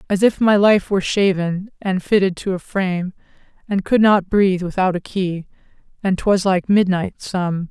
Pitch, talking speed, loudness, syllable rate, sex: 190 Hz, 185 wpm, -18 LUFS, 4.9 syllables/s, female